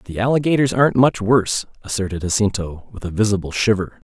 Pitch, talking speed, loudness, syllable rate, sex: 105 Hz, 160 wpm, -19 LUFS, 6.1 syllables/s, male